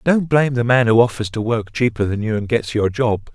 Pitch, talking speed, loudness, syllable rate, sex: 115 Hz, 270 wpm, -18 LUFS, 5.6 syllables/s, male